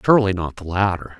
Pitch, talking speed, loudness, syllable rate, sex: 95 Hz, 200 wpm, -20 LUFS, 6.5 syllables/s, male